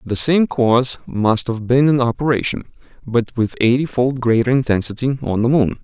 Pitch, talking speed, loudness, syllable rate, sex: 125 Hz, 175 wpm, -17 LUFS, 5.0 syllables/s, male